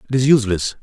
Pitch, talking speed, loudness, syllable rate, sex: 115 Hz, 220 wpm, -16 LUFS, 8.1 syllables/s, male